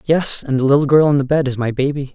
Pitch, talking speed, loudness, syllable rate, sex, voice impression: 140 Hz, 305 wpm, -16 LUFS, 6.3 syllables/s, male, very masculine, slightly middle-aged, slightly thick, slightly relaxed, slightly weak, slightly dark, slightly hard, slightly clear, fluent, slightly cool, intellectual, slightly refreshing, very sincere, calm, slightly mature, slightly friendly, slightly reassuring, unique, slightly wild, slightly sweet, slightly lively, kind, slightly sharp, modest